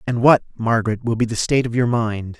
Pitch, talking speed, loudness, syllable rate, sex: 115 Hz, 250 wpm, -19 LUFS, 6.1 syllables/s, male